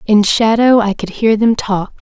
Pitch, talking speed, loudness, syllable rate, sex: 215 Hz, 200 wpm, -13 LUFS, 4.4 syllables/s, female